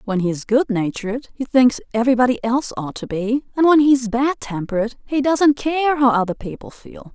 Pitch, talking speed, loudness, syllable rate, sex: 245 Hz, 200 wpm, -18 LUFS, 5.5 syllables/s, female